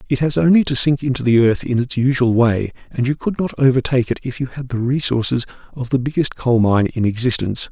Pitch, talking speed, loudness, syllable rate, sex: 125 Hz, 235 wpm, -17 LUFS, 6.0 syllables/s, male